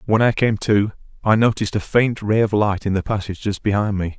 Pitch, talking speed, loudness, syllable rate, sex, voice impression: 105 Hz, 245 wpm, -19 LUFS, 5.9 syllables/s, male, very masculine, very adult-like, slightly old, very thick, very thin, slightly relaxed, powerful, slightly dark, slightly soft, clear, very fluent, slightly raspy, very cool, very intellectual, sincere, calm, very mature, very friendly, very reassuring, very unique, elegant, very wild, sweet, slightly lively, kind, modest